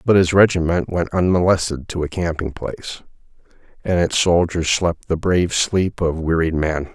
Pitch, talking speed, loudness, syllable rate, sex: 85 Hz, 165 wpm, -19 LUFS, 5.1 syllables/s, male